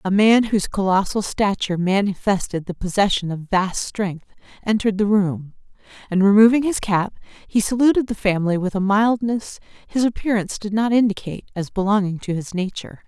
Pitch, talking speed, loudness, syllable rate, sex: 200 Hz, 160 wpm, -20 LUFS, 5.6 syllables/s, female